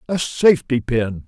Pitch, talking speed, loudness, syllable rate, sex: 135 Hz, 140 wpm, -18 LUFS, 4.6 syllables/s, male